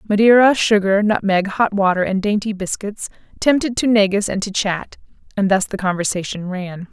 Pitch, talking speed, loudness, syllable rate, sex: 200 Hz, 165 wpm, -17 LUFS, 5.1 syllables/s, female